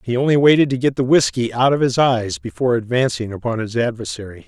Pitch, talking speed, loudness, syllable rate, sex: 125 Hz, 215 wpm, -18 LUFS, 6.2 syllables/s, male